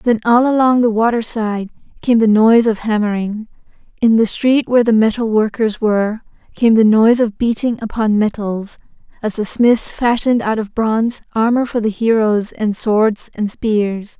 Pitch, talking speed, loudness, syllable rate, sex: 220 Hz, 165 wpm, -15 LUFS, 4.9 syllables/s, female